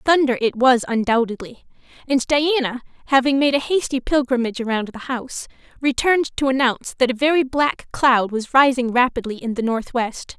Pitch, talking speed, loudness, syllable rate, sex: 255 Hz, 160 wpm, -19 LUFS, 5.5 syllables/s, female